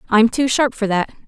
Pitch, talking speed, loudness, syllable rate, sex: 230 Hz, 235 wpm, -17 LUFS, 5.3 syllables/s, female